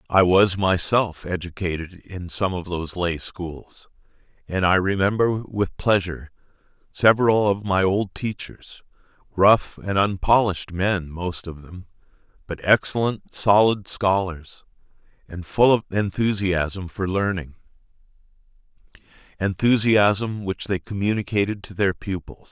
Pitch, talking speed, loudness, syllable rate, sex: 95 Hz, 115 wpm, -22 LUFS, 4.2 syllables/s, male